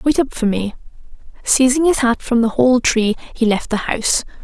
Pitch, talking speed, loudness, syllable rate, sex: 245 Hz, 205 wpm, -16 LUFS, 5.1 syllables/s, female